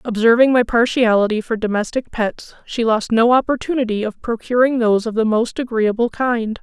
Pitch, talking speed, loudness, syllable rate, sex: 230 Hz, 165 wpm, -17 LUFS, 5.3 syllables/s, female